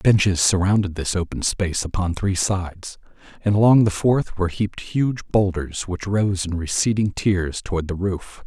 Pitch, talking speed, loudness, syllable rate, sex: 95 Hz, 170 wpm, -21 LUFS, 4.7 syllables/s, male